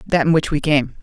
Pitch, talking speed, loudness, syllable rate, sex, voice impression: 150 Hz, 295 wpm, -17 LUFS, 5.8 syllables/s, male, slightly masculine, very adult-like, slightly cool, slightly refreshing, slightly sincere, slightly unique